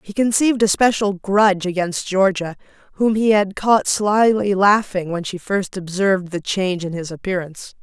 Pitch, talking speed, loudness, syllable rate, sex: 195 Hz, 170 wpm, -18 LUFS, 5.0 syllables/s, female